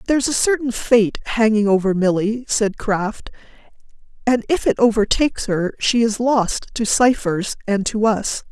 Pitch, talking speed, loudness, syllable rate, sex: 220 Hz, 160 wpm, -18 LUFS, 4.6 syllables/s, female